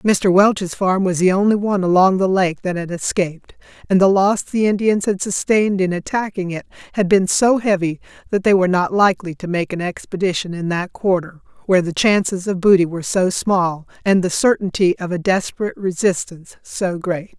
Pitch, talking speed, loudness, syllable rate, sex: 185 Hz, 195 wpm, -18 LUFS, 5.4 syllables/s, female